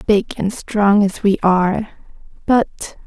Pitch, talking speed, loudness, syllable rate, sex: 205 Hz, 135 wpm, -17 LUFS, 4.3 syllables/s, female